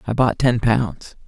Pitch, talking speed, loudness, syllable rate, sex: 110 Hz, 190 wpm, -19 LUFS, 3.8 syllables/s, male